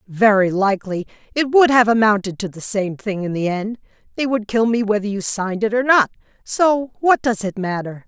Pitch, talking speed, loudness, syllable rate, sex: 215 Hz, 200 wpm, -18 LUFS, 5.3 syllables/s, female